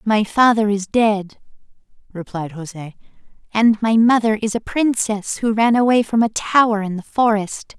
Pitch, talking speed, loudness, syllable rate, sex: 215 Hz, 160 wpm, -17 LUFS, 4.3 syllables/s, male